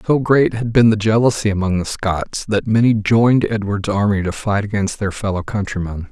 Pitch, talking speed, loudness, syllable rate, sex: 105 Hz, 195 wpm, -17 LUFS, 5.3 syllables/s, male